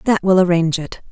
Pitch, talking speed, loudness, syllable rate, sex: 180 Hz, 215 wpm, -16 LUFS, 6.5 syllables/s, female